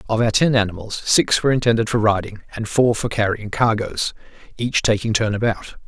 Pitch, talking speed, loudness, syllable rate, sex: 110 Hz, 185 wpm, -19 LUFS, 5.6 syllables/s, male